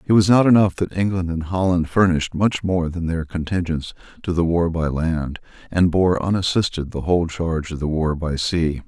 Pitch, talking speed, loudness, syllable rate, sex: 85 Hz, 205 wpm, -20 LUFS, 5.2 syllables/s, male